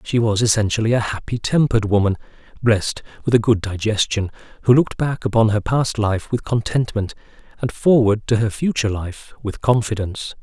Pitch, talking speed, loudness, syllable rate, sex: 110 Hz, 165 wpm, -19 LUFS, 5.6 syllables/s, male